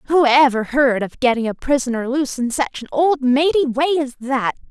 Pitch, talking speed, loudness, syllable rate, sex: 265 Hz, 205 wpm, -18 LUFS, 5.2 syllables/s, female